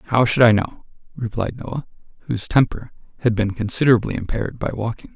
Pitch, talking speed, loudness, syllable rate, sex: 115 Hz, 165 wpm, -20 LUFS, 6.0 syllables/s, male